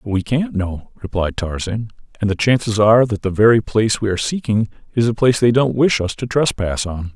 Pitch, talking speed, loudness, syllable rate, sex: 110 Hz, 220 wpm, -17 LUFS, 5.6 syllables/s, male